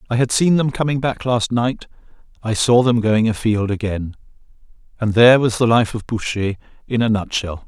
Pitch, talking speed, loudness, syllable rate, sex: 115 Hz, 190 wpm, -18 LUFS, 5.2 syllables/s, male